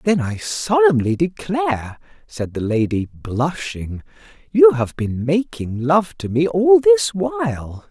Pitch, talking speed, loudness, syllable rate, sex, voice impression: 170 Hz, 135 wpm, -18 LUFS, 3.7 syllables/s, male, very masculine, very adult-like, middle-aged, very thick, slightly tensed, slightly powerful, bright, slightly soft, slightly muffled, slightly halting, cool, very intellectual, very sincere, very calm, very mature, friendly, reassuring, slightly unique, wild, slightly sweet, very lively, slightly strict, slightly sharp